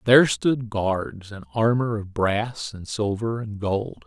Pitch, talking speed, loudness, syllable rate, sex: 110 Hz, 160 wpm, -24 LUFS, 3.7 syllables/s, male